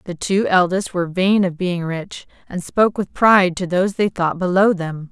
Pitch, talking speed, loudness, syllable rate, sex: 185 Hz, 210 wpm, -18 LUFS, 5.0 syllables/s, female